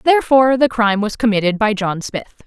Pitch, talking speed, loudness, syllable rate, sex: 225 Hz, 195 wpm, -16 LUFS, 6.2 syllables/s, female